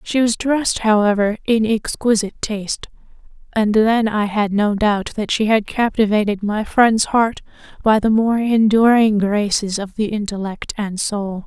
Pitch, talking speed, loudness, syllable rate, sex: 215 Hz, 150 wpm, -17 LUFS, 4.4 syllables/s, female